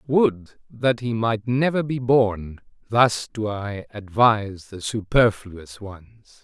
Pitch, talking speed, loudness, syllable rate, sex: 110 Hz, 120 wpm, -21 LUFS, 3.2 syllables/s, male